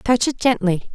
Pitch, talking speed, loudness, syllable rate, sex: 220 Hz, 190 wpm, -19 LUFS, 4.6 syllables/s, female